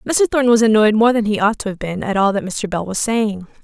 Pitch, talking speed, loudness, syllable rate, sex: 215 Hz, 295 wpm, -16 LUFS, 5.9 syllables/s, female